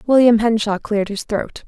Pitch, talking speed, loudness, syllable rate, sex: 220 Hz, 180 wpm, -17 LUFS, 5.3 syllables/s, female